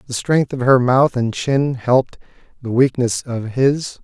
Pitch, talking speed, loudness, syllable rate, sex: 130 Hz, 180 wpm, -17 LUFS, 4.1 syllables/s, male